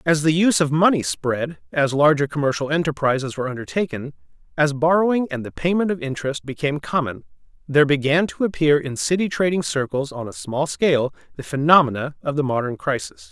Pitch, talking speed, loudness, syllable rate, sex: 145 Hz, 175 wpm, -20 LUFS, 6.0 syllables/s, male